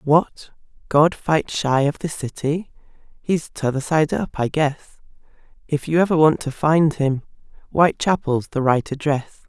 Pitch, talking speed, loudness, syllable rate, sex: 150 Hz, 160 wpm, -20 LUFS, 4.5 syllables/s, female